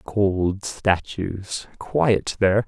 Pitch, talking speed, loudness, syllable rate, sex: 95 Hz, 90 wpm, -23 LUFS, 2.5 syllables/s, male